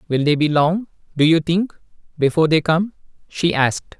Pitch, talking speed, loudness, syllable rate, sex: 160 Hz, 180 wpm, -18 LUFS, 5.3 syllables/s, male